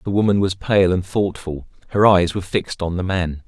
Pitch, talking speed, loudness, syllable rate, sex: 95 Hz, 225 wpm, -19 LUFS, 5.5 syllables/s, male